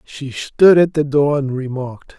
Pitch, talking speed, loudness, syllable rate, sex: 140 Hz, 190 wpm, -15 LUFS, 4.3 syllables/s, male